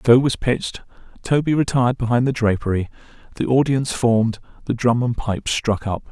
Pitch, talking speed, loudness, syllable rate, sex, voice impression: 120 Hz, 175 wpm, -20 LUFS, 5.9 syllables/s, male, masculine, middle-aged, relaxed, powerful, slightly dark, slightly muffled, raspy, sincere, calm, mature, friendly, reassuring, wild, kind, modest